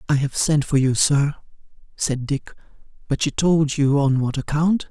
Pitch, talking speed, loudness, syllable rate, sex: 145 Hz, 170 wpm, -20 LUFS, 4.4 syllables/s, male